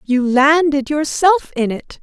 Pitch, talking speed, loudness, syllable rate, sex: 290 Hz, 150 wpm, -15 LUFS, 3.7 syllables/s, female